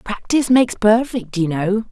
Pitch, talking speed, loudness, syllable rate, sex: 215 Hz, 155 wpm, -17 LUFS, 5.1 syllables/s, female